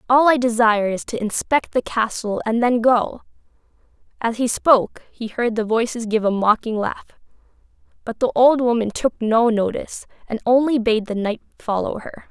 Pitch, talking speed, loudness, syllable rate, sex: 230 Hz, 175 wpm, -19 LUFS, 5.0 syllables/s, female